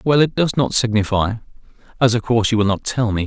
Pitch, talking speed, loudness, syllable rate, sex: 115 Hz, 240 wpm, -18 LUFS, 6.1 syllables/s, male